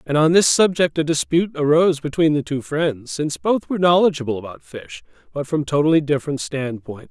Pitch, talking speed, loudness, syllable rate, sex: 155 Hz, 185 wpm, -19 LUFS, 5.9 syllables/s, male